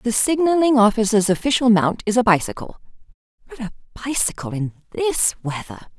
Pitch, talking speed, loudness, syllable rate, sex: 220 Hz, 140 wpm, -19 LUFS, 5.6 syllables/s, female